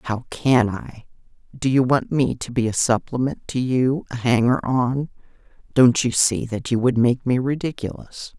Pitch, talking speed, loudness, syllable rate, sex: 125 Hz, 170 wpm, -20 LUFS, 4.4 syllables/s, female